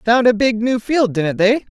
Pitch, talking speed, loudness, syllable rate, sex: 230 Hz, 240 wpm, -16 LUFS, 4.5 syllables/s, female